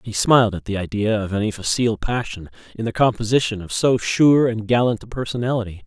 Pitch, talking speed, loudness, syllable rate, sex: 110 Hz, 195 wpm, -20 LUFS, 6.0 syllables/s, male